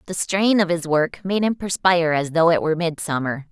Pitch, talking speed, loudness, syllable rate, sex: 170 Hz, 220 wpm, -20 LUFS, 5.5 syllables/s, female